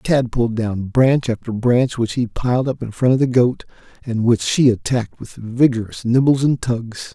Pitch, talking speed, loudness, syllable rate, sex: 120 Hz, 200 wpm, -18 LUFS, 4.8 syllables/s, male